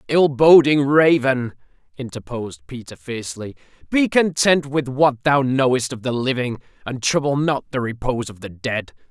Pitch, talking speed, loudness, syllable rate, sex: 130 Hz, 150 wpm, -19 LUFS, 4.9 syllables/s, male